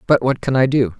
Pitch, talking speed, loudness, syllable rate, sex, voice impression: 125 Hz, 300 wpm, -17 LUFS, 6.0 syllables/s, male, masculine, adult-like, tensed, bright, clear, fluent, cool, refreshing, calm, friendly, reassuring, wild, lively, slightly kind, modest